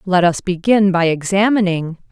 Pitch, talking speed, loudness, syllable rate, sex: 185 Hz, 140 wpm, -16 LUFS, 4.7 syllables/s, female